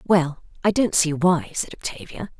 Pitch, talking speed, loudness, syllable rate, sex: 175 Hz, 175 wpm, -22 LUFS, 4.5 syllables/s, female